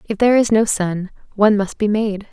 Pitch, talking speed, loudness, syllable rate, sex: 210 Hz, 235 wpm, -17 LUFS, 5.7 syllables/s, female